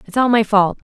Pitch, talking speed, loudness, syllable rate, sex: 215 Hz, 265 wpm, -15 LUFS, 5.7 syllables/s, female